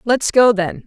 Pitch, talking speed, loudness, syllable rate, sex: 215 Hz, 210 wpm, -15 LUFS, 3.9 syllables/s, female